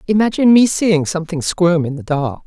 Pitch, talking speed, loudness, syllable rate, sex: 175 Hz, 195 wpm, -15 LUFS, 5.6 syllables/s, female